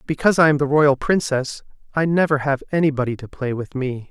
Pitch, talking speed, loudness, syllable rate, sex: 145 Hz, 205 wpm, -19 LUFS, 5.9 syllables/s, male